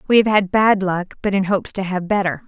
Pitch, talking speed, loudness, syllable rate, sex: 195 Hz, 265 wpm, -18 LUFS, 5.9 syllables/s, female